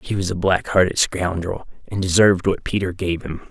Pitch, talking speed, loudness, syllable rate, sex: 90 Hz, 205 wpm, -20 LUFS, 5.4 syllables/s, male